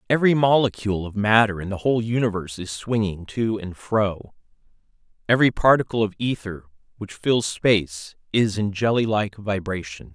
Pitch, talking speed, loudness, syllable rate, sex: 105 Hz, 150 wpm, -22 LUFS, 5.3 syllables/s, male